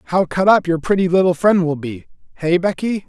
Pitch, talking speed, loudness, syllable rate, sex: 175 Hz, 215 wpm, -17 LUFS, 5.2 syllables/s, male